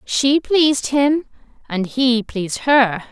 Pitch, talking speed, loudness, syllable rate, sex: 255 Hz, 135 wpm, -17 LUFS, 3.6 syllables/s, female